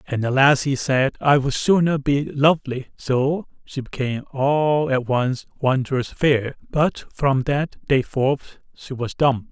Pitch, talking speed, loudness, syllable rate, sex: 135 Hz, 160 wpm, -20 LUFS, 3.7 syllables/s, male